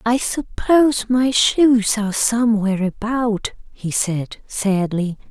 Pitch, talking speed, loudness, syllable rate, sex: 220 Hz, 115 wpm, -18 LUFS, 3.7 syllables/s, female